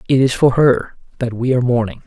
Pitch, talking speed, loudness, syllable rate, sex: 125 Hz, 230 wpm, -16 LUFS, 6.1 syllables/s, male